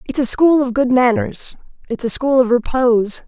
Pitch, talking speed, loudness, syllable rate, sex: 255 Hz, 200 wpm, -15 LUFS, 5.0 syllables/s, female